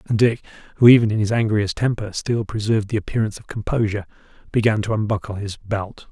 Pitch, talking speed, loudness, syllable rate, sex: 105 Hz, 185 wpm, -20 LUFS, 6.4 syllables/s, male